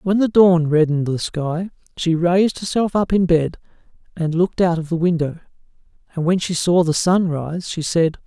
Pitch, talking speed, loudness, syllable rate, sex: 170 Hz, 195 wpm, -18 LUFS, 5.1 syllables/s, male